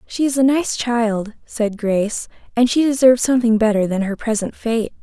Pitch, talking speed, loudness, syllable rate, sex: 230 Hz, 190 wpm, -18 LUFS, 5.2 syllables/s, female